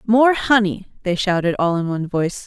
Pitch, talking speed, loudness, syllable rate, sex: 195 Hz, 195 wpm, -19 LUFS, 5.6 syllables/s, female